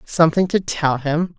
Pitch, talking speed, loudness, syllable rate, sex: 160 Hz, 175 wpm, -18 LUFS, 4.7 syllables/s, female